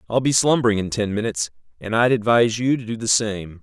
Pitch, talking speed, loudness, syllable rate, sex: 110 Hz, 230 wpm, -20 LUFS, 6.3 syllables/s, male